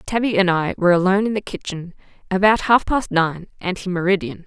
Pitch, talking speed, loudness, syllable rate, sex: 190 Hz, 190 wpm, -19 LUFS, 6.0 syllables/s, female